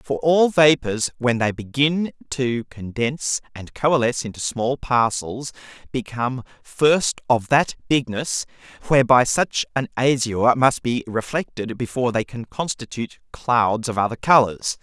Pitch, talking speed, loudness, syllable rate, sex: 125 Hz, 135 wpm, -21 LUFS, 4.5 syllables/s, male